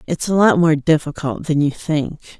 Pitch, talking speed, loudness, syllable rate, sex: 155 Hz, 200 wpm, -17 LUFS, 4.8 syllables/s, female